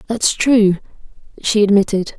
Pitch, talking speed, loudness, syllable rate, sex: 210 Hz, 110 wpm, -15 LUFS, 4.4 syllables/s, female